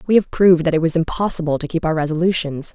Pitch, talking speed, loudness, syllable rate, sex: 165 Hz, 240 wpm, -18 LUFS, 6.9 syllables/s, female